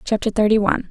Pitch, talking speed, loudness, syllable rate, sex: 215 Hz, 200 wpm, -18 LUFS, 7.4 syllables/s, female